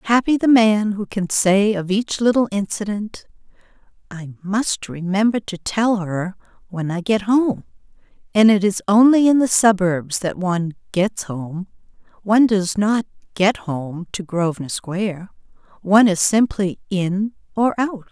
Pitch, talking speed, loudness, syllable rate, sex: 200 Hz, 150 wpm, -18 LUFS, 4.3 syllables/s, female